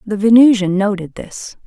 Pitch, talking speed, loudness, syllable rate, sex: 200 Hz, 145 wpm, -12 LUFS, 4.7 syllables/s, female